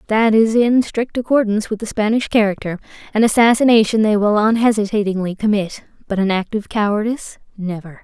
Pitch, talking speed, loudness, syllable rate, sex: 215 Hz, 155 wpm, -17 LUFS, 5.8 syllables/s, female